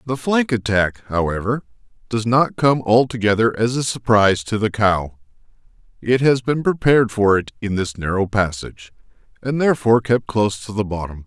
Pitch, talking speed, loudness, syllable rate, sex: 110 Hz, 165 wpm, -18 LUFS, 5.3 syllables/s, male